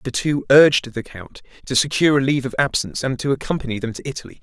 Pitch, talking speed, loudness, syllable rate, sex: 135 Hz, 230 wpm, -19 LUFS, 7.0 syllables/s, male